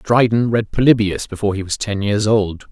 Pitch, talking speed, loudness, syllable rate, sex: 105 Hz, 200 wpm, -17 LUFS, 5.4 syllables/s, male